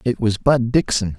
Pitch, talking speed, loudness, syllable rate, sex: 115 Hz, 205 wpm, -18 LUFS, 4.6 syllables/s, male